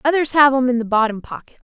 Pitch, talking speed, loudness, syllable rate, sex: 260 Hz, 250 wpm, -16 LUFS, 6.7 syllables/s, female